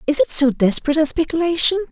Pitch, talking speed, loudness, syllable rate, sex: 300 Hz, 190 wpm, -17 LUFS, 7.2 syllables/s, female